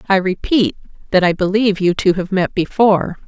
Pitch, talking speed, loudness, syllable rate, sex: 195 Hz, 185 wpm, -16 LUFS, 5.6 syllables/s, female